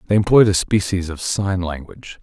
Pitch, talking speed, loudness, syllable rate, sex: 90 Hz, 190 wpm, -18 LUFS, 5.4 syllables/s, male